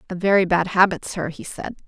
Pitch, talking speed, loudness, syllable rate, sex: 185 Hz, 225 wpm, -20 LUFS, 5.7 syllables/s, female